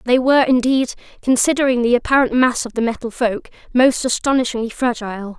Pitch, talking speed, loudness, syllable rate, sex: 245 Hz, 155 wpm, -17 LUFS, 5.9 syllables/s, female